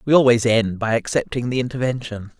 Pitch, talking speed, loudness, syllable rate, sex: 120 Hz, 175 wpm, -20 LUFS, 5.9 syllables/s, male